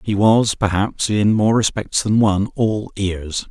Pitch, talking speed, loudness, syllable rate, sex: 105 Hz, 170 wpm, -18 LUFS, 4.0 syllables/s, male